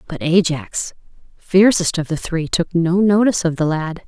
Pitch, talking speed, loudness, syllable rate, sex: 175 Hz, 175 wpm, -17 LUFS, 4.7 syllables/s, female